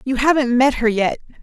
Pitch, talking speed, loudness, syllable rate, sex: 250 Hz, 210 wpm, -17 LUFS, 5.5 syllables/s, female